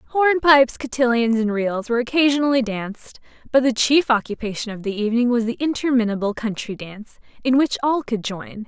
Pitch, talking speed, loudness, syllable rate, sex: 240 Hz, 165 wpm, -20 LUFS, 5.7 syllables/s, female